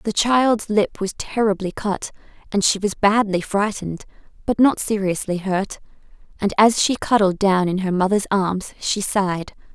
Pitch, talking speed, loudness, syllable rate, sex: 200 Hz, 160 wpm, -20 LUFS, 4.6 syllables/s, female